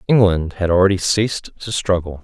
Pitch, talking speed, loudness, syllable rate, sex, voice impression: 95 Hz, 160 wpm, -18 LUFS, 5.3 syllables/s, male, masculine, adult-like, relaxed, weak, slightly dark, slightly raspy, cool, calm, slightly reassuring, kind, modest